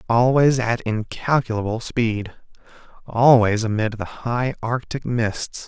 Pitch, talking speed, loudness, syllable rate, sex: 115 Hz, 105 wpm, -21 LUFS, 3.8 syllables/s, male